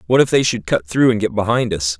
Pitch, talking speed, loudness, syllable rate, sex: 110 Hz, 300 wpm, -17 LUFS, 6.0 syllables/s, male